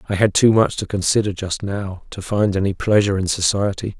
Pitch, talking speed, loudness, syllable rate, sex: 100 Hz, 210 wpm, -19 LUFS, 5.6 syllables/s, male